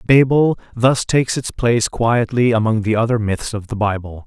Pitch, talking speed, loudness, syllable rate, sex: 115 Hz, 185 wpm, -17 LUFS, 5.0 syllables/s, male